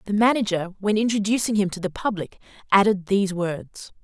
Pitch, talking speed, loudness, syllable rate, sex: 200 Hz, 165 wpm, -22 LUFS, 5.7 syllables/s, female